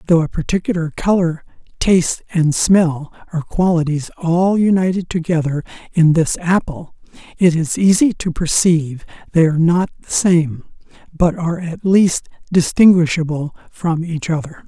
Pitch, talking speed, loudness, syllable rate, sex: 170 Hz, 135 wpm, -16 LUFS, 4.8 syllables/s, male